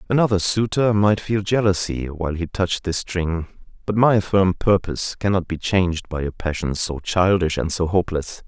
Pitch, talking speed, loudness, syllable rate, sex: 95 Hz, 175 wpm, -21 LUFS, 5.1 syllables/s, male